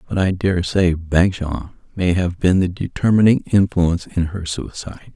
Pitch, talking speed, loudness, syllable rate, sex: 90 Hz, 165 wpm, -18 LUFS, 4.8 syllables/s, male